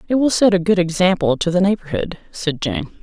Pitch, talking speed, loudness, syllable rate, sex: 185 Hz, 220 wpm, -18 LUFS, 5.6 syllables/s, female